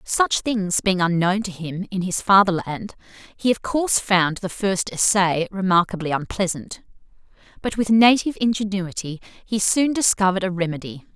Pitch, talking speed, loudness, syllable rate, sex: 195 Hz, 145 wpm, -20 LUFS, 4.9 syllables/s, female